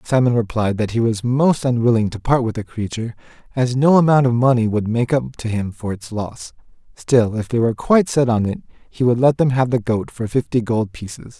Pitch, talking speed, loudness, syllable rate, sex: 120 Hz, 230 wpm, -18 LUFS, 5.5 syllables/s, male